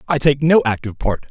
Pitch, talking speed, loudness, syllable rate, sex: 135 Hz, 230 wpm, -17 LUFS, 6.3 syllables/s, male